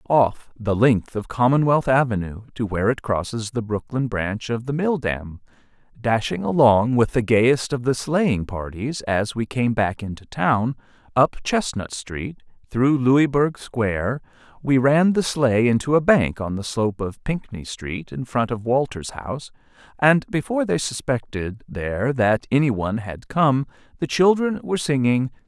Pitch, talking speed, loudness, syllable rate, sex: 125 Hz, 160 wpm, -21 LUFS, 4.5 syllables/s, male